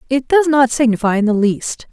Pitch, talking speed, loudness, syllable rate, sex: 250 Hz, 220 wpm, -15 LUFS, 5.3 syllables/s, female